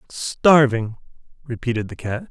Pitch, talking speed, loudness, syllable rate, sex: 125 Hz, 105 wpm, -19 LUFS, 4.3 syllables/s, male